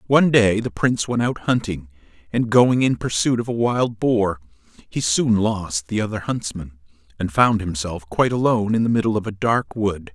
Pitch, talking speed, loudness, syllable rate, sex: 105 Hz, 195 wpm, -20 LUFS, 5.0 syllables/s, male